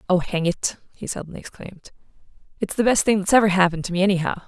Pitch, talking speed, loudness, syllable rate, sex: 190 Hz, 215 wpm, -21 LUFS, 7.4 syllables/s, female